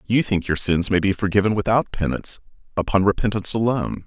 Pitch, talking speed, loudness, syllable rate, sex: 100 Hz, 175 wpm, -21 LUFS, 6.4 syllables/s, male